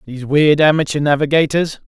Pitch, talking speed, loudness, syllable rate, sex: 150 Hz, 125 wpm, -15 LUFS, 5.9 syllables/s, male